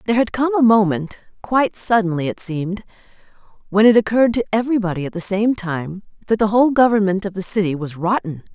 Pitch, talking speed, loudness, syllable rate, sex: 205 Hz, 175 wpm, -18 LUFS, 6.4 syllables/s, female